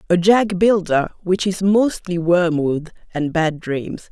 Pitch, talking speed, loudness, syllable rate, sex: 180 Hz, 145 wpm, -18 LUFS, 3.6 syllables/s, female